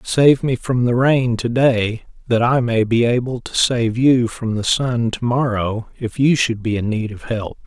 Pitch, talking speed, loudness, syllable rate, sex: 120 Hz, 220 wpm, -18 LUFS, 4.2 syllables/s, male